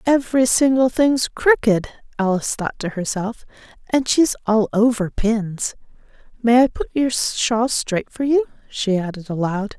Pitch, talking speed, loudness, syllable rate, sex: 230 Hz, 140 wpm, -19 LUFS, 4.3 syllables/s, female